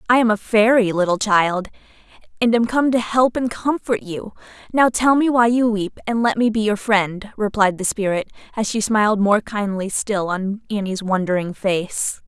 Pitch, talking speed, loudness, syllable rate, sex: 215 Hz, 190 wpm, -19 LUFS, 4.7 syllables/s, female